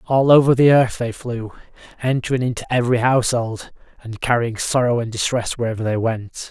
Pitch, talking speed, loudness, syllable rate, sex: 120 Hz, 165 wpm, -19 LUFS, 5.7 syllables/s, male